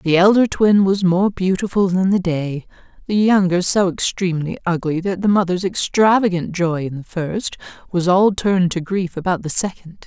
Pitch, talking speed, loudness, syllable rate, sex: 185 Hz, 175 wpm, -18 LUFS, 4.9 syllables/s, female